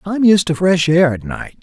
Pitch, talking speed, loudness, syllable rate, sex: 180 Hz, 260 wpm, -14 LUFS, 4.7 syllables/s, male